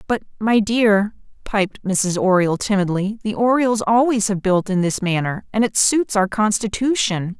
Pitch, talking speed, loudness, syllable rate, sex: 205 Hz, 160 wpm, -18 LUFS, 4.7 syllables/s, female